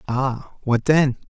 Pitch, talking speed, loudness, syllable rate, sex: 130 Hz, 135 wpm, -21 LUFS, 3.1 syllables/s, male